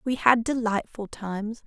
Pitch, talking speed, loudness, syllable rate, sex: 225 Hz, 145 wpm, -25 LUFS, 4.5 syllables/s, female